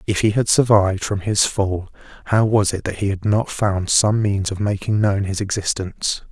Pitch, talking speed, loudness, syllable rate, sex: 100 Hz, 210 wpm, -19 LUFS, 4.9 syllables/s, male